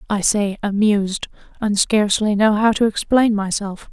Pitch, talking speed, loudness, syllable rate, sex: 210 Hz, 140 wpm, -18 LUFS, 4.8 syllables/s, female